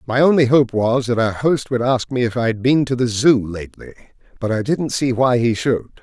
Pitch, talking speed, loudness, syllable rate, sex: 125 Hz, 250 wpm, -17 LUFS, 5.3 syllables/s, male